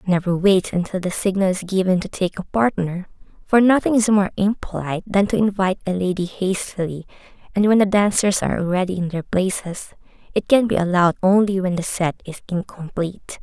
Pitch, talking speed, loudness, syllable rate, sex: 190 Hz, 185 wpm, -20 LUFS, 5.7 syllables/s, female